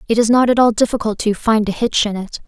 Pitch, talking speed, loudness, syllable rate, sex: 220 Hz, 290 wpm, -16 LUFS, 6.2 syllables/s, female